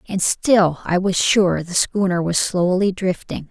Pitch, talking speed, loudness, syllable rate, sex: 185 Hz, 170 wpm, -18 LUFS, 4.0 syllables/s, female